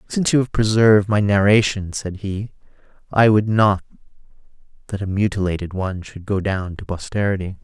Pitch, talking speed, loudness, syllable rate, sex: 100 Hz, 155 wpm, -19 LUFS, 5.5 syllables/s, male